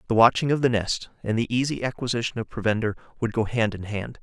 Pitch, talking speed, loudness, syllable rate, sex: 115 Hz, 225 wpm, -25 LUFS, 6.3 syllables/s, male